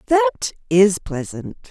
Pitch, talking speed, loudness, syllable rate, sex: 185 Hz, 105 wpm, -19 LUFS, 3.9 syllables/s, female